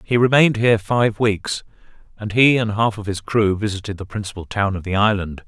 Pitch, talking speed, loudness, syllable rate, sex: 105 Hz, 210 wpm, -19 LUFS, 5.6 syllables/s, male